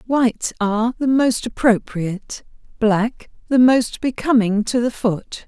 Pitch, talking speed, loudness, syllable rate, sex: 230 Hz, 130 wpm, -18 LUFS, 4.1 syllables/s, female